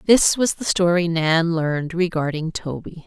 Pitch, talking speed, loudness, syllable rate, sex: 170 Hz, 155 wpm, -20 LUFS, 4.5 syllables/s, female